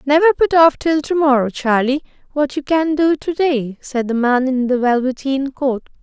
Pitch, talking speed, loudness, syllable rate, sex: 275 Hz, 200 wpm, -16 LUFS, 4.7 syllables/s, female